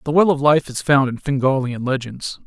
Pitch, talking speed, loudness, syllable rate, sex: 140 Hz, 220 wpm, -18 LUFS, 5.3 syllables/s, male